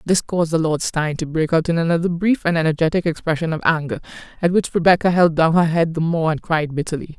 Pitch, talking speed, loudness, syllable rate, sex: 165 Hz, 235 wpm, -19 LUFS, 6.3 syllables/s, female